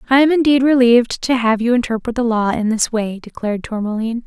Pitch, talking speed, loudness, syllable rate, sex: 235 Hz, 210 wpm, -16 LUFS, 6.1 syllables/s, female